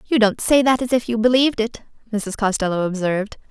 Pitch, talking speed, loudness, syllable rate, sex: 225 Hz, 205 wpm, -19 LUFS, 6.0 syllables/s, female